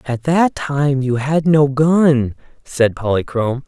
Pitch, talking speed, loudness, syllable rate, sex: 140 Hz, 145 wpm, -16 LUFS, 3.6 syllables/s, male